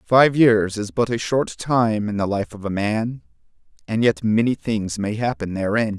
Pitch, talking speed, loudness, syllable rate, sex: 110 Hz, 200 wpm, -21 LUFS, 4.4 syllables/s, male